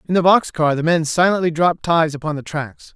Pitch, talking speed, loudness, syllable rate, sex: 165 Hz, 245 wpm, -17 LUFS, 5.8 syllables/s, male